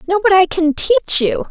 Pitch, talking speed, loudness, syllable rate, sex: 365 Hz, 240 wpm, -14 LUFS, 5.7 syllables/s, female